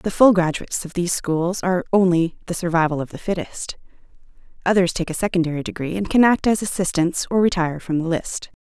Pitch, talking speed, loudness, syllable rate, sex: 175 Hz, 195 wpm, -20 LUFS, 6.1 syllables/s, female